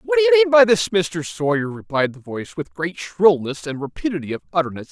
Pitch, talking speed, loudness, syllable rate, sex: 175 Hz, 220 wpm, -19 LUFS, 5.9 syllables/s, male